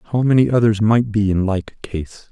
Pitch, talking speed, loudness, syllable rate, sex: 105 Hz, 205 wpm, -17 LUFS, 4.4 syllables/s, male